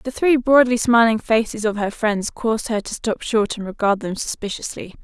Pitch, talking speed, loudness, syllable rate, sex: 225 Hz, 205 wpm, -19 LUFS, 5.1 syllables/s, female